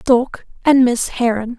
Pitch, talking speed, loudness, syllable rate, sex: 245 Hz, 150 wpm, -16 LUFS, 3.7 syllables/s, female